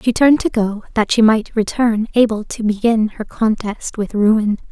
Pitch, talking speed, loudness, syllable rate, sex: 220 Hz, 190 wpm, -16 LUFS, 4.5 syllables/s, female